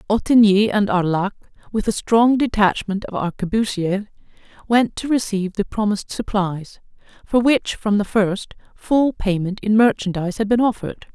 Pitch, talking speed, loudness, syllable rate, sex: 210 Hz, 145 wpm, -19 LUFS, 5.0 syllables/s, female